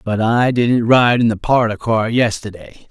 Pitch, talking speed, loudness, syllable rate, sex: 115 Hz, 185 wpm, -15 LUFS, 4.3 syllables/s, male